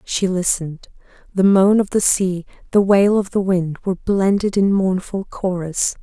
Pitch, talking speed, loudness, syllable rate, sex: 190 Hz, 170 wpm, -18 LUFS, 4.4 syllables/s, female